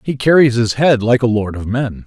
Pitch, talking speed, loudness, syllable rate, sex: 120 Hz, 260 wpm, -14 LUFS, 5.1 syllables/s, male